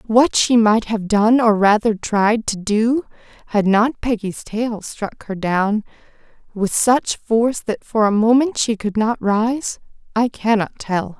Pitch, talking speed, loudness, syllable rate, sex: 220 Hz, 165 wpm, -18 LUFS, 3.8 syllables/s, female